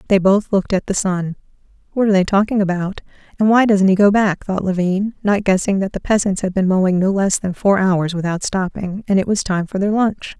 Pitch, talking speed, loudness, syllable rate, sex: 195 Hz, 235 wpm, -17 LUFS, 5.6 syllables/s, female